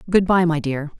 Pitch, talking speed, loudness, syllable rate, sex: 165 Hz, 240 wpm, -19 LUFS, 5.3 syllables/s, female